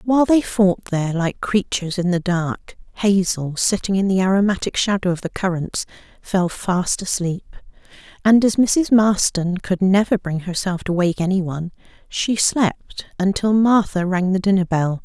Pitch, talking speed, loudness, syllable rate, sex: 190 Hz, 160 wpm, -19 LUFS, 4.6 syllables/s, female